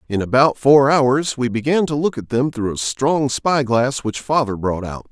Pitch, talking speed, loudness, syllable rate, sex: 130 Hz, 210 wpm, -18 LUFS, 4.5 syllables/s, male